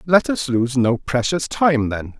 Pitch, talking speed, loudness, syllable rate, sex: 140 Hz, 190 wpm, -19 LUFS, 3.9 syllables/s, male